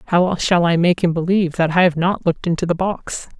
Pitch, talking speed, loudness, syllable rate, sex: 175 Hz, 250 wpm, -17 LUFS, 5.9 syllables/s, female